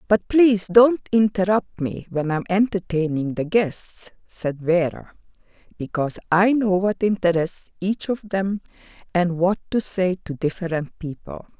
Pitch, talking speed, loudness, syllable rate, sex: 190 Hz, 145 wpm, -21 LUFS, 4.4 syllables/s, female